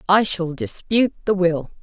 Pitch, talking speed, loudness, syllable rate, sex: 180 Hz, 165 wpm, -20 LUFS, 4.9 syllables/s, female